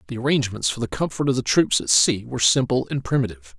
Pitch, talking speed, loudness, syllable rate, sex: 120 Hz, 235 wpm, -21 LUFS, 6.9 syllables/s, male